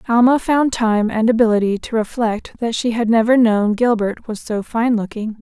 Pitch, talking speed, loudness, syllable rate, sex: 225 Hz, 185 wpm, -17 LUFS, 4.9 syllables/s, female